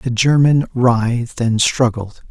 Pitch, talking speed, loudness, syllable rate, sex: 120 Hz, 130 wpm, -15 LUFS, 3.8 syllables/s, male